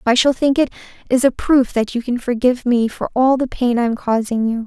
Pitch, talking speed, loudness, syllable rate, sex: 245 Hz, 255 wpm, -17 LUFS, 5.6 syllables/s, female